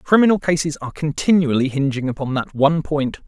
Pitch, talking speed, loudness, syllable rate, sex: 150 Hz, 165 wpm, -19 LUFS, 6.0 syllables/s, male